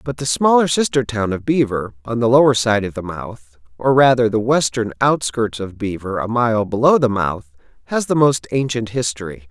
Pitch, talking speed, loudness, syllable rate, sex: 115 Hz, 185 wpm, -17 LUFS, 5.0 syllables/s, male